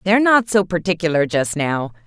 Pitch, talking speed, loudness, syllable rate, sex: 175 Hz, 175 wpm, -18 LUFS, 5.5 syllables/s, female